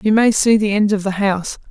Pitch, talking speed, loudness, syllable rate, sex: 205 Hz, 280 wpm, -16 LUFS, 5.9 syllables/s, female